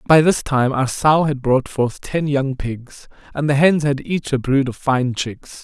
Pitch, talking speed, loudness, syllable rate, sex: 140 Hz, 225 wpm, -18 LUFS, 4.1 syllables/s, male